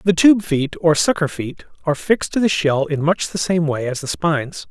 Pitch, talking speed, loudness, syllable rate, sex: 160 Hz, 245 wpm, -18 LUFS, 5.2 syllables/s, male